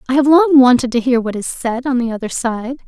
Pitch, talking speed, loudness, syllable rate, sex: 250 Hz, 270 wpm, -15 LUFS, 5.8 syllables/s, female